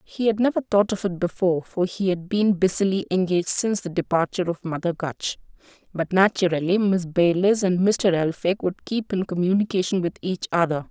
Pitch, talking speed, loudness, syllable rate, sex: 185 Hz, 180 wpm, -22 LUFS, 5.5 syllables/s, female